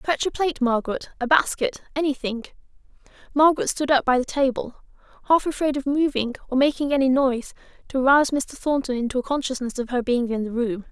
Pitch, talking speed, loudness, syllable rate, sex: 270 Hz, 175 wpm, -22 LUFS, 6.2 syllables/s, female